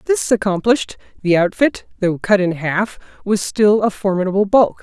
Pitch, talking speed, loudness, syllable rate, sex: 205 Hz, 160 wpm, -17 LUFS, 5.0 syllables/s, female